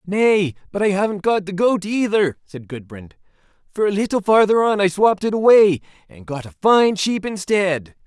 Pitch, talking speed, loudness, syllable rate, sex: 190 Hz, 185 wpm, -18 LUFS, 4.8 syllables/s, male